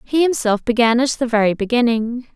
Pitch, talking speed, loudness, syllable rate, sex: 240 Hz, 180 wpm, -17 LUFS, 5.4 syllables/s, female